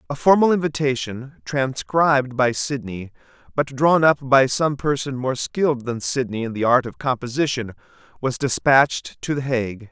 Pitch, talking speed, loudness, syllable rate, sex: 130 Hz, 155 wpm, -20 LUFS, 4.8 syllables/s, male